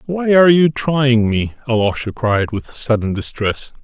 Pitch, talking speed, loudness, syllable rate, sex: 125 Hz, 155 wpm, -16 LUFS, 4.3 syllables/s, male